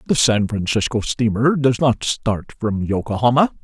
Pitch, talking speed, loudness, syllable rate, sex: 115 Hz, 150 wpm, -19 LUFS, 4.5 syllables/s, male